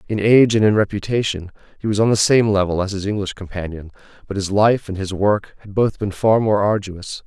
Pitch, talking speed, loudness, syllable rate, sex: 100 Hz, 225 wpm, -18 LUFS, 5.6 syllables/s, male